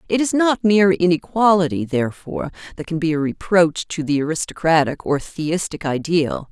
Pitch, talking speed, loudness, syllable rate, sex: 170 Hz, 155 wpm, -19 LUFS, 5.3 syllables/s, female